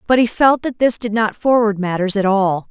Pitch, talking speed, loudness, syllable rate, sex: 215 Hz, 245 wpm, -16 LUFS, 5.1 syllables/s, female